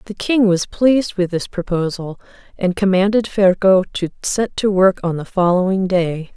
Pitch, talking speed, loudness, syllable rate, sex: 190 Hz, 170 wpm, -17 LUFS, 4.7 syllables/s, female